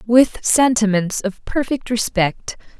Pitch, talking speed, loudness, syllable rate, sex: 225 Hz, 105 wpm, -18 LUFS, 3.7 syllables/s, female